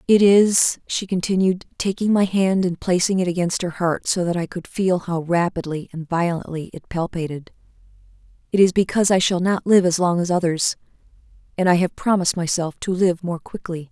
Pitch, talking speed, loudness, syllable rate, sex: 180 Hz, 190 wpm, -20 LUFS, 5.4 syllables/s, female